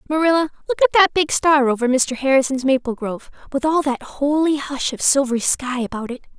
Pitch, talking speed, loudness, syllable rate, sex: 280 Hz, 195 wpm, -18 LUFS, 6.2 syllables/s, female